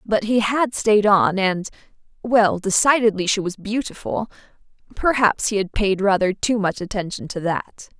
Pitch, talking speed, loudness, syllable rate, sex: 205 Hz, 145 wpm, -20 LUFS, 4.6 syllables/s, female